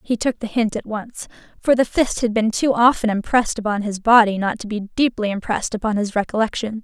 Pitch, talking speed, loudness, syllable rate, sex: 220 Hz, 220 wpm, -19 LUFS, 5.9 syllables/s, female